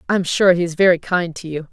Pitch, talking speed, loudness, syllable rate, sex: 175 Hz, 315 wpm, -17 LUFS, 6.6 syllables/s, female